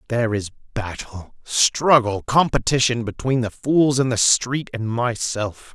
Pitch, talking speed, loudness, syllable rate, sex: 120 Hz, 135 wpm, -20 LUFS, 3.9 syllables/s, male